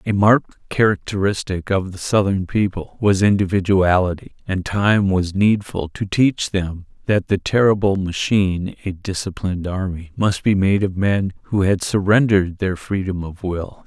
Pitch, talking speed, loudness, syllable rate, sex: 95 Hz, 150 wpm, -19 LUFS, 4.6 syllables/s, male